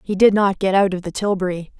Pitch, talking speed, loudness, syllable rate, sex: 190 Hz, 270 wpm, -18 LUFS, 6.1 syllables/s, female